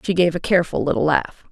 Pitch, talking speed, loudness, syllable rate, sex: 165 Hz, 240 wpm, -19 LUFS, 6.8 syllables/s, female